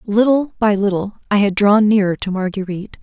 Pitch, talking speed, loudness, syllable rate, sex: 205 Hz, 180 wpm, -16 LUFS, 5.6 syllables/s, female